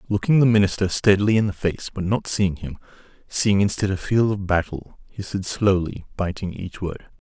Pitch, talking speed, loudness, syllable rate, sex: 100 Hz, 190 wpm, -21 LUFS, 5.2 syllables/s, male